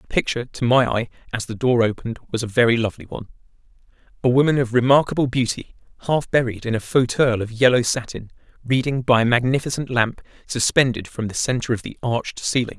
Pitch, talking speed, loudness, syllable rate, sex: 120 Hz, 185 wpm, -20 LUFS, 6.3 syllables/s, male